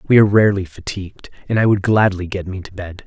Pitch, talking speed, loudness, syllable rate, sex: 95 Hz, 235 wpm, -17 LUFS, 6.6 syllables/s, male